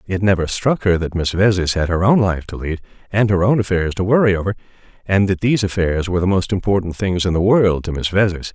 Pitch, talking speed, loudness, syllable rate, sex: 95 Hz, 245 wpm, -17 LUFS, 6.0 syllables/s, male